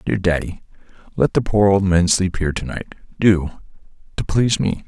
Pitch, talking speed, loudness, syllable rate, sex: 90 Hz, 170 wpm, -18 LUFS, 5.2 syllables/s, male